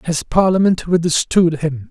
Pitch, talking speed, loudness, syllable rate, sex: 165 Hz, 125 wpm, -16 LUFS, 3.9 syllables/s, male